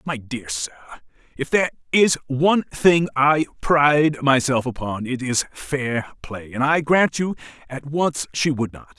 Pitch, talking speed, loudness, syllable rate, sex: 135 Hz, 165 wpm, -20 LUFS, 4.3 syllables/s, male